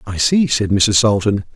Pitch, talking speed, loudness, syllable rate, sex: 110 Hz, 195 wpm, -15 LUFS, 4.4 syllables/s, male